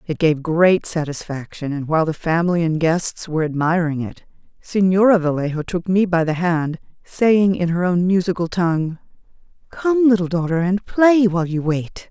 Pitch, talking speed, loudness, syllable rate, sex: 175 Hz, 170 wpm, -18 LUFS, 5.0 syllables/s, female